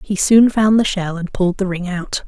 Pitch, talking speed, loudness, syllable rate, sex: 190 Hz, 265 wpm, -16 LUFS, 5.1 syllables/s, female